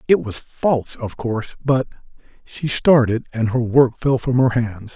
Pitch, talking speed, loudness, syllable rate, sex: 125 Hz, 180 wpm, -19 LUFS, 4.5 syllables/s, male